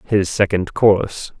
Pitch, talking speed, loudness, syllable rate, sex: 95 Hz, 130 wpm, -17 LUFS, 4.0 syllables/s, male